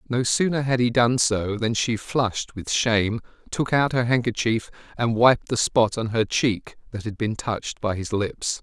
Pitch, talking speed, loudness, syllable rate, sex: 115 Hz, 200 wpm, -23 LUFS, 4.5 syllables/s, male